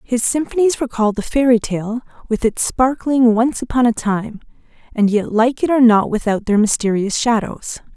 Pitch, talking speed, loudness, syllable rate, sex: 235 Hz, 175 wpm, -16 LUFS, 4.9 syllables/s, female